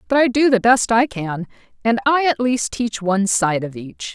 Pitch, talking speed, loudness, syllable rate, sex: 215 Hz, 230 wpm, -18 LUFS, 4.8 syllables/s, female